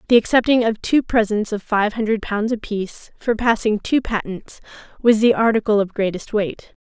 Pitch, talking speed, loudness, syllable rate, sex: 220 Hz, 175 wpm, -19 LUFS, 5.1 syllables/s, female